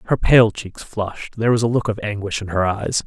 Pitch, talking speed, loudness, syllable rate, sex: 110 Hz, 255 wpm, -19 LUFS, 5.6 syllables/s, male